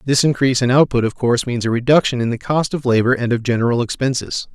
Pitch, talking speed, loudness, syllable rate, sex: 125 Hz, 240 wpm, -17 LUFS, 6.6 syllables/s, male